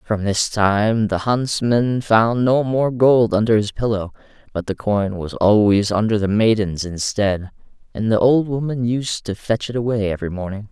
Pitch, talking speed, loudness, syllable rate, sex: 110 Hz, 180 wpm, -18 LUFS, 4.5 syllables/s, male